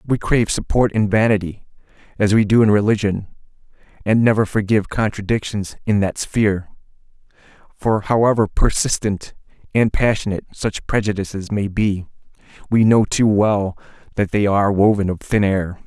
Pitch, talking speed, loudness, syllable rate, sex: 105 Hz, 140 wpm, -18 LUFS, 5.3 syllables/s, male